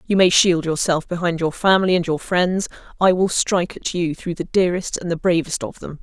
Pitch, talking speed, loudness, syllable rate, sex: 175 Hz, 220 wpm, -19 LUFS, 5.6 syllables/s, female